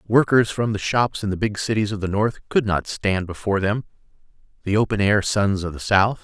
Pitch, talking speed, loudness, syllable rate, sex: 100 Hz, 220 wpm, -21 LUFS, 5.3 syllables/s, male